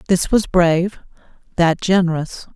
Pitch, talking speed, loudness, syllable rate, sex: 175 Hz, 115 wpm, -17 LUFS, 4.6 syllables/s, female